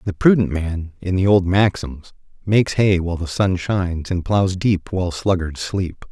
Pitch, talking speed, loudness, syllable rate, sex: 90 Hz, 185 wpm, -19 LUFS, 4.7 syllables/s, male